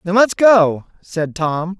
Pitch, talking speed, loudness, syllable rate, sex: 180 Hz, 170 wpm, -15 LUFS, 3.2 syllables/s, male